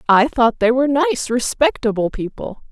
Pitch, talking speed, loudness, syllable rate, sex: 245 Hz, 155 wpm, -17 LUFS, 4.9 syllables/s, female